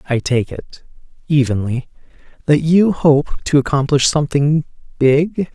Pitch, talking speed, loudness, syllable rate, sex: 145 Hz, 85 wpm, -16 LUFS, 4.3 syllables/s, male